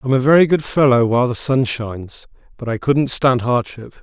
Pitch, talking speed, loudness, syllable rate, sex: 125 Hz, 210 wpm, -16 LUFS, 5.4 syllables/s, male